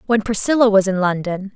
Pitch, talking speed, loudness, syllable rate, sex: 205 Hz, 195 wpm, -17 LUFS, 5.8 syllables/s, female